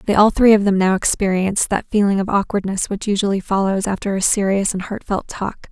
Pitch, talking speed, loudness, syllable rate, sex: 200 Hz, 210 wpm, -18 LUFS, 5.8 syllables/s, female